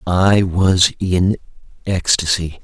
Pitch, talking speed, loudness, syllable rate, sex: 90 Hz, 90 wpm, -16 LUFS, 3.1 syllables/s, male